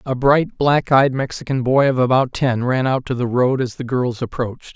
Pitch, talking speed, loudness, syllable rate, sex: 130 Hz, 225 wpm, -18 LUFS, 5.0 syllables/s, male